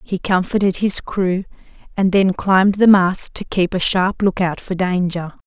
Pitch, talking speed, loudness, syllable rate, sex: 185 Hz, 175 wpm, -17 LUFS, 4.4 syllables/s, female